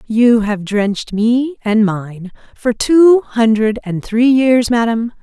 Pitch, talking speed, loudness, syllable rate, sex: 230 Hz, 150 wpm, -14 LUFS, 3.4 syllables/s, female